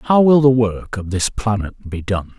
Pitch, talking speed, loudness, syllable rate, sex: 110 Hz, 225 wpm, -17 LUFS, 4.3 syllables/s, male